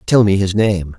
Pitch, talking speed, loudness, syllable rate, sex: 100 Hz, 245 wpm, -15 LUFS, 4.6 syllables/s, male